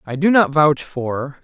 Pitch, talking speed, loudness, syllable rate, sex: 150 Hz, 210 wpm, -17 LUFS, 4.0 syllables/s, male